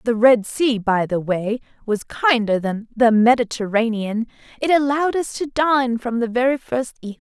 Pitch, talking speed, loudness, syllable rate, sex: 240 Hz, 175 wpm, -19 LUFS, 4.9 syllables/s, female